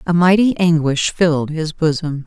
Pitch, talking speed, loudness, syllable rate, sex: 160 Hz, 160 wpm, -16 LUFS, 4.7 syllables/s, female